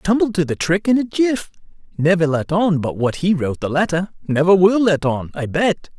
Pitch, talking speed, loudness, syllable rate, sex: 175 Hz, 220 wpm, -18 LUFS, 5.2 syllables/s, male